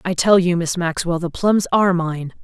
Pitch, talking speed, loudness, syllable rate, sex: 175 Hz, 220 wpm, -18 LUFS, 5.0 syllables/s, female